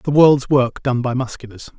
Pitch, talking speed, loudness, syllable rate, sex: 130 Hz, 200 wpm, -17 LUFS, 4.8 syllables/s, male